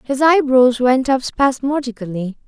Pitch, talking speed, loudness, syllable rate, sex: 260 Hz, 120 wpm, -16 LUFS, 4.3 syllables/s, female